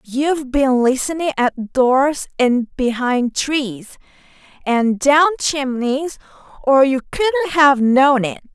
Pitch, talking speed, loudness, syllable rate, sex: 270 Hz, 100 wpm, -16 LUFS, 3.2 syllables/s, female